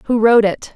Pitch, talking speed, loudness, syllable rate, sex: 220 Hz, 240 wpm, -14 LUFS, 5.6 syllables/s, female